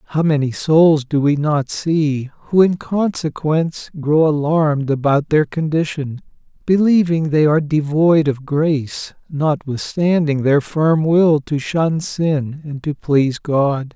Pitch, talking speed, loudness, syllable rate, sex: 150 Hz, 140 wpm, -17 LUFS, 3.9 syllables/s, male